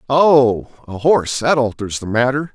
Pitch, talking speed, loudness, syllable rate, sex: 130 Hz, 165 wpm, -16 LUFS, 4.6 syllables/s, male